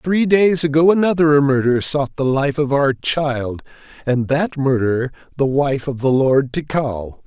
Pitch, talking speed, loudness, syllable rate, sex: 140 Hz, 165 wpm, -17 LUFS, 4.3 syllables/s, male